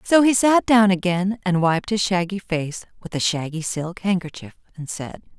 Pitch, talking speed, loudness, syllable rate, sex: 185 Hz, 190 wpm, -20 LUFS, 4.6 syllables/s, female